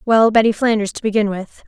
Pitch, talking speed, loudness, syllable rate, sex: 215 Hz, 215 wpm, -16 LUFS, 5.8 syllables/s, female